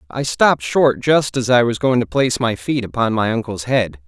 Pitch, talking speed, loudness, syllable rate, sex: 120 Hz, 235 wpm, -17 LUFS, 5.2 syllables/s, male